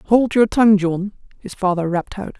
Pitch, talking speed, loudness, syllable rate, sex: 200 Hz, 200 wpm, -17 LUFS, 5.3 syllables/s, female